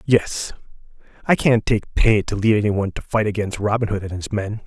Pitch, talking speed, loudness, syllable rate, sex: 105 Hz, 205 wpm, -20 LUFS, 5.3 syllables/s, male